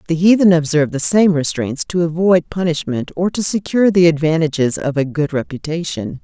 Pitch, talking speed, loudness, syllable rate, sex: 165 Hz, 175 wpm, -16 LUFS, 5.5 syllables/s, female